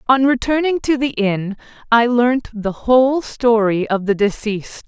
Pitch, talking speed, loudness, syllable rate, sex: 235 Hz, 160 wpm, -17 LUFS, 4.4 syllables/s, female